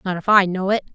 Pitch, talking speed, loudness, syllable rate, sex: 190 Hz, 315 wpm, -18 LUFS, 6.6 syllables/s, female